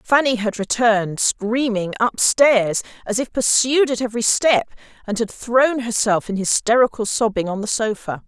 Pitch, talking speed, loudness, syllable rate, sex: 225 Hz, 160 wpm, -18 LUFS, 4.6 syllables/s, female